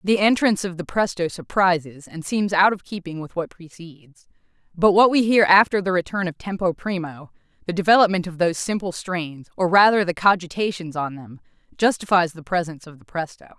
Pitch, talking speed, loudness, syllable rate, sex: 180 Hz, 175 wpm, -20 LUFS, 5.6 syllables/s, female